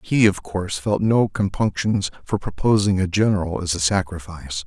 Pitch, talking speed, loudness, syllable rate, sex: 95 Hz, 165 wpm, -21 LUFS, 5.2 syllables/s, male